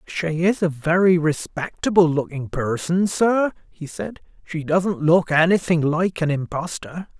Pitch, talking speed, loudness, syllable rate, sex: 165 Hz, 140 wpm, -20 LUFS, 4.1 syllables/s, male